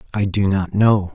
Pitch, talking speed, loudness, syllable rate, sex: 100 Hz, 210 wpm, -18 LUFS, 4.6 syllables/s, male